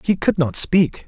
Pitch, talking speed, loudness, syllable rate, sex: 155 Hz, 225 wpm, -18 LUFS, 4.1 syllables/s, male